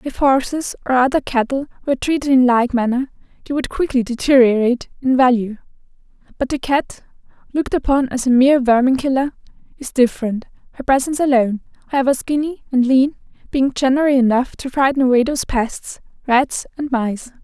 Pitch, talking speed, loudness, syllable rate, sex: 260 Hz, 160 wpm, -17 LUFS, 6.0 syllables/s, female